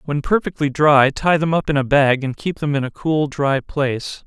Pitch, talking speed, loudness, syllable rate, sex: 145 Hz, 240 wpm, -18 LUFS, 4.8 syllables/s, male